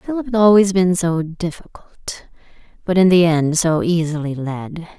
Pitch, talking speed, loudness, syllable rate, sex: 175 Hz, 155 wpm, -16 LUFS, 4.4 syllables/s, female